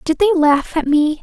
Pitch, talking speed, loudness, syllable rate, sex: 320 Hz, 245 wpm, -15 LUFS, 4.9 syllables/s, female